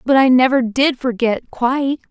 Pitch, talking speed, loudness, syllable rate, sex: 255 Hz, 140 wpm, -16 LUFS, 4.7 syllables/s, female